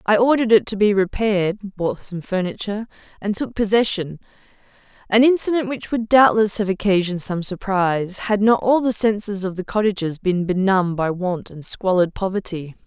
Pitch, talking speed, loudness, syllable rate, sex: 200 Hz, 170 wpm, -20 LUFS, 5.3 syllables/s, female